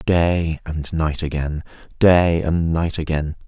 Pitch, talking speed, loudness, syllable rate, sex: 80 Hz, 140 wpm, -20 LUFS, 3.4 syllables/s, male